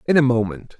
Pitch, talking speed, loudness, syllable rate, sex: 125 Hz, 225 wpm, -19 LUFS, 6.6 syllables/s, male